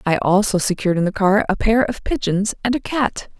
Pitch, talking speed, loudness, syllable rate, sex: 205 Hz, 230 wpm, -19 LUFS, 5.5 syllables/s, female